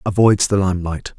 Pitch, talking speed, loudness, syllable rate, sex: 95 Hz, 150 wpm, -17 LUFS, 5.7 syllables/s, male